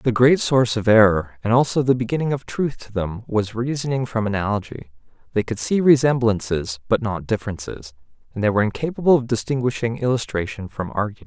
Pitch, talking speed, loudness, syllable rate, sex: 115 Hz, 175 wpm, -20 LUFS, 6.0 syllables/s, male